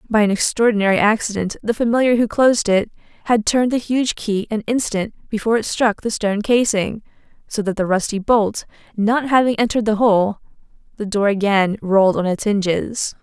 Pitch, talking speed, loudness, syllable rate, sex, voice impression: 215 Hz, 175 wpm, -18 LUFS, 5.6 syllables/s, female, feminine, adult-like, tensed, slightly powerful, bright, slightly hard, clear, intellectual, calm, slightly friendly, reassuring, elegant, slightly lively, slightly sharp